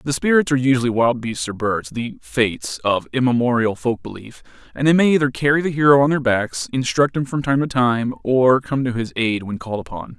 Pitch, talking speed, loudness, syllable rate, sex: 130 Hz, 210 wpm, -19 LUFS, 5.6 syllables/s, male